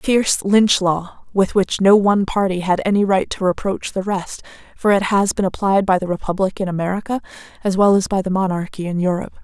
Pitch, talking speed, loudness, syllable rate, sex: 190 Hz, 210 wpm, -18 LUFS, 5.6 syllables/s, female